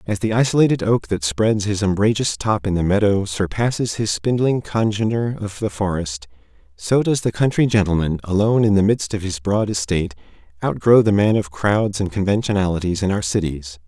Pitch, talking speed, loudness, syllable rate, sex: 100 Hz, 180 wpm, -19 LUFS, 5.4 syllables/s, male